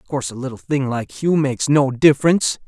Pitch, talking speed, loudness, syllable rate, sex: 135 Hz, 225 wpm, -18 LUFS, 6.2 syllables/s, male